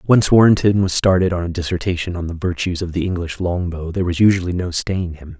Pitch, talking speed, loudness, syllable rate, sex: 90 Hz, 220 wpm, -18 LUFS, 6.1 syllables/s, male